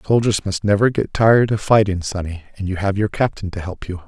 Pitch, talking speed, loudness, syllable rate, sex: 100 Hz, 235 wpm, -18 LUFS, 5.9 syllables/s, male